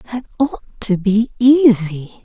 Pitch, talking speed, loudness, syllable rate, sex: 225 Hz, 135 wpm, -15 LUFS, 3.8 syllables/s, female